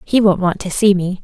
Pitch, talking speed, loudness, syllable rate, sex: 190 Hz, 290 wpm, -15 LUFS, 5.3 syllables/s, female